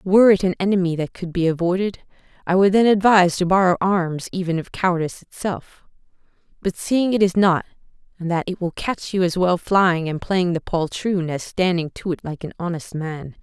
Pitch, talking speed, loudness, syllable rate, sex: 180 Hz, 195 wpm, -20 LUFS, 5.2 syllables/s, female